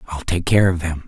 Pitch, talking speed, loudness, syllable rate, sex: 85 Hz, 280 wpm, -19 LUFS, 5.2 syllables/s, male